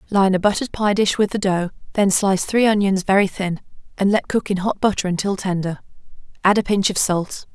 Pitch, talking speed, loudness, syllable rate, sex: 195 Hz, 215 wpm, -19 LUFS, 5.8 syllables/s, female